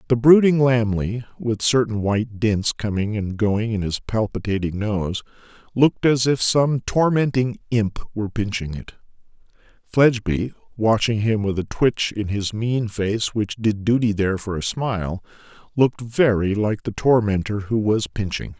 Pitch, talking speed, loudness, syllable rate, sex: 110 Hz, 155 wpm, -21 LUFS, 4.6 syllables/s, male